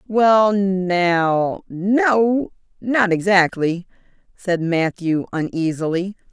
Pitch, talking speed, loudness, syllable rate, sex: 190 Hz, 55 wpm, -18 LUFS, 2.7 syllables/s, female